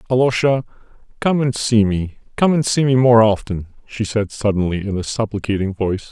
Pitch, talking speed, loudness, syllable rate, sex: 110 Hz, 175 wpm, -18 LUFS, 5.4 syllables/s, male